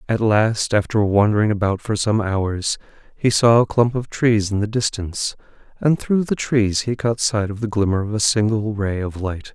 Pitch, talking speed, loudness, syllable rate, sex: 110 Hz, 205 wpm, -19 LUFS, 4.8 syllables/s, male